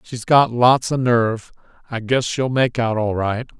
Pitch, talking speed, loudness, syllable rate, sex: 120 Hz, 200 wpm, -18 LUFS, 4.4 syllables/s, male